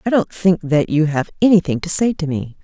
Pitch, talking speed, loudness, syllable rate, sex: 170 Hz, 250 wpm, -17 LUFS, 5.5 syllables/s, female